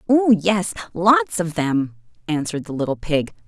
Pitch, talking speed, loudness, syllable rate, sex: 180 Hz, 155 wpm, -20 LUFS, 4.6 syllables/s, female